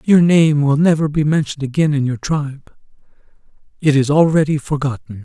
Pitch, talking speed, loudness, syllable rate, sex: 145 Hz, 150 wpm, -16 LUFS, 5.6 syllables/s, male